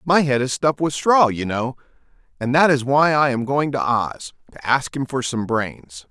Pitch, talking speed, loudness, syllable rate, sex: 130 Hz, 225 wpm, -19 LUFS, 4.6 syllables/s, male